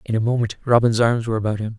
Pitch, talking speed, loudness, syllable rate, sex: 115 Hz, 270 wpm, -20 LUFS, 7.4 syllables/s, male